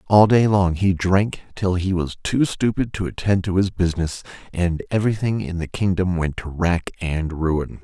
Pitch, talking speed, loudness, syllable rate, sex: 90 Hz, 190 wpm, -21 LUFS, 4.7 syllables/s, male